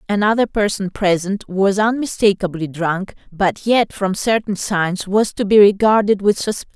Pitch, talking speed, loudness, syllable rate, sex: 200 Hz, 150 wpm, -17 LUFS, 4.7 syllables/s, female